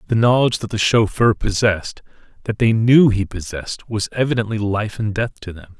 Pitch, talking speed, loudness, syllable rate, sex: 110 Hz, 185 wpm, -18 LUFS, 5.5 syllables/s, male